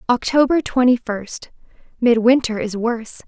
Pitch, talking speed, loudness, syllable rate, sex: 240 Hz, 90 wpm, -18 LUFS, 4.7 syllables/s, female